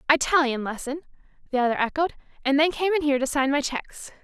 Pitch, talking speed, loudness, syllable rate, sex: 285 Hz, 200 wpm, -24 LUFS, 6.8 syllables/s, female